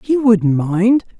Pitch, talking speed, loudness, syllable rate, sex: 210 Hz, 150 wpm, -14 LUFS, 3.1 syllables/s, female